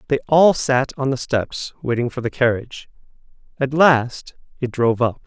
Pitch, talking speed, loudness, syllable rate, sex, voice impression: 130 Hz, 170 wpm, -19 LUFS, 4.8 syllables/s, male, very masculine, very adult-like, slightly thick, tensed, slightly powerful, bright, soft, slightly clear, fluent, slightly cool, intellectual, refreshing, sincere, very calm, slightly mature, friendly, reassuring, slightly unique, elegant, slightly wild, sweet, lively, kind, slightly modest